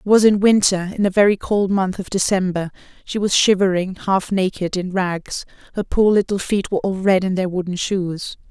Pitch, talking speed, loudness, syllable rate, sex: 190 Hz, 205 wpm, -19 LUFS, 5.1 syllables/s, female